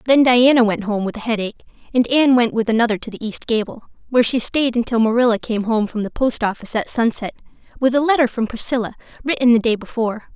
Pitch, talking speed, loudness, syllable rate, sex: 235 Hz, 220 wpm, -18 LUFS, 6.6 syllables/s, female